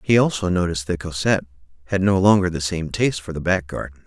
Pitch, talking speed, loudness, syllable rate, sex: 90 Hz, 220 wpm, -21 LUFS, 6.6 syllables/s, male